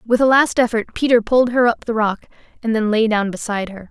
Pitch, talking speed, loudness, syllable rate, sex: 225 Hz, 245 wpm, -17 LUFS, 6.3 syllables/s, female